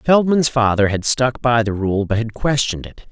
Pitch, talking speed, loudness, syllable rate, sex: 120 Hz, 210 wpm, -17 LUFS, 4.9 syllables/s, male